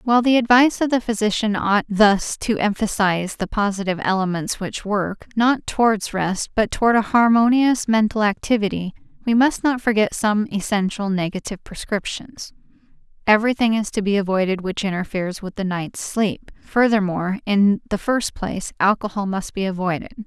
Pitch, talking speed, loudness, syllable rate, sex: 210 Hz, 155 wpm, -20 LUFS, 5.2 syllables/s, female